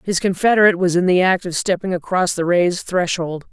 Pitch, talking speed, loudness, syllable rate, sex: 180 Hz, 205 wpm, -17 LUFS, 5.9 syllables/s, female